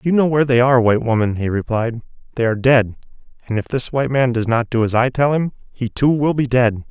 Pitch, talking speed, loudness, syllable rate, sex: 125 Hz, 250 wpm, -17 LUFS, 6.3 syllables/s, male